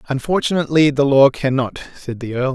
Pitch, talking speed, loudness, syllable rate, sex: 140 Hz, 190 wpm, -16 LUFS, 5.7 syllables/s, male